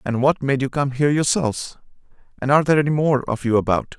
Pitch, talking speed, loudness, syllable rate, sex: 135 Hz, 210 wpm, -20 LUFS, 6.8 syllables/s, male